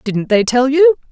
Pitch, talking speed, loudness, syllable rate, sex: 235 Hz, 215 wpm, -13 LUFS, 4.4 syllables/s, female